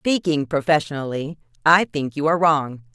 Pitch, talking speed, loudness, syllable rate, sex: 150 Hz, 145 wpm, -20 LUFS, 5.1 syllables/s, female